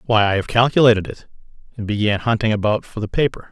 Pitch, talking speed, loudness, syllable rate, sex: 110 Hz, 205 wpm, -18 LUFS, 6.6 syllables/s, male